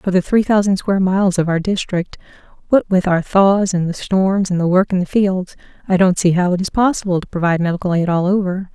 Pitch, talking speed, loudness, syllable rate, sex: 185 Hz, 240 wpm, -16 LUFS, 5.9 syllables/s, female